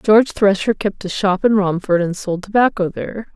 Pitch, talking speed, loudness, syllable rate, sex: 200 Hz, 195 wpm, -17 LUFS, 5.5 syllables/s, female